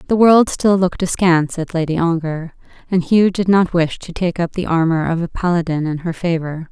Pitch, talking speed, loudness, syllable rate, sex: 170 Hz, 215 wpm, -17 LUFS, 5.3 syllables/s, female